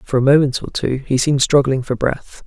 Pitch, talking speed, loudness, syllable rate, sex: 135 Hz, 245 wpm, -17 LUFS, 5.6 syllables/s, male